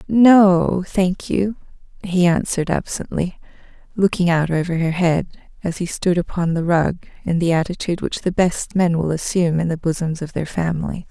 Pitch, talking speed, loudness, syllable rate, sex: 175 Hz, 175 wpm, -19 LUFS, 5.0 syllables/s, female